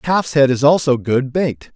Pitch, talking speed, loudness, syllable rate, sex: 140 Hz, 205 wpm, -16 LUFS, 4.9 syllables/s, male